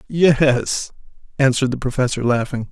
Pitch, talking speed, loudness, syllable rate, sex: 130 Hz, 110 wpm, -18 LUFS, 4.9 syllables/s, male